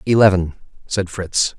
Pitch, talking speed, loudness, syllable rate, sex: 95 Hz, 115 wpm, -18 LUFS, 4.2 syllables/s, male